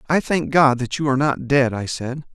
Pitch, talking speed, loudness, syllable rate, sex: 135 Hz, 255 wpm, -19 LUFS, 5.3 syllables/s, male